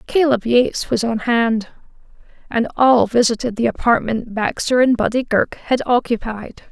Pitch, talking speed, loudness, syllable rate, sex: 235 Hz, 145 wpm, -17 LUFS, 4.6 syllables/s, female